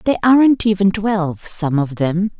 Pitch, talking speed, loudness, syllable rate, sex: 195 Hz, 175 wpm, -16 LUFS, 4.7 syllables/s, female